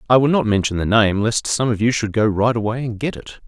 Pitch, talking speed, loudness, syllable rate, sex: 115 Hz, 295 wpm, -18 LUFS, 5.8 syllables/s, male